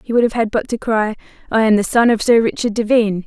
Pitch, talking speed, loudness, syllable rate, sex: 225 Hz, 275 wpm, -16 LUFS, 6.4 syllables/s, female